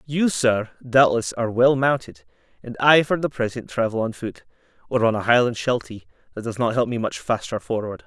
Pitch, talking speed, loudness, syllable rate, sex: 120 Hz, 200 wpm, -21 LUFS, 5.3 syllables/s, male